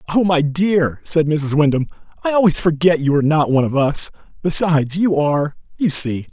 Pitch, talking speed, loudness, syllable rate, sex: 155 Hz, 190 wpm, -17 LUFS, 5.4 syllables/s, male